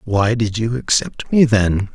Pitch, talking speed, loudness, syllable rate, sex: 110 Hz, 185 wpm, -17 LUFS, 3.9 syllables/s, male